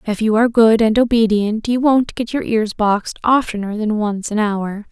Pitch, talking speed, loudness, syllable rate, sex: 220 Hz, 205 wpm, -16 LUFS, 4.8 syllables/s, female